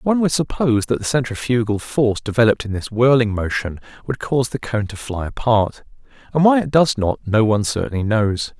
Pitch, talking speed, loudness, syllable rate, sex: 120 Hz, 195 wpm, -19 LUFS, 5.8 syllables/s, male